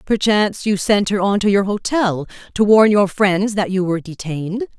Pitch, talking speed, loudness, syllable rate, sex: 200 Hz, 200 wpm, -17 LUFS, 5.1 syllables/s, female